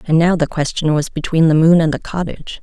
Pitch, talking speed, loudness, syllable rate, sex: 160 Hz, 250 wpm, -15 LUFS, 6.0 syllables/s, female